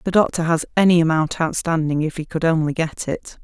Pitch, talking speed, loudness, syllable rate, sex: 165 Hz, 210 wpm, -19 LUFS, 5.6 syllables/s, female